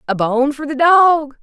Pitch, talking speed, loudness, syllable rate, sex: 285 Hz, 210 wpm, -14 LUFS, 4.0 syllables/s, female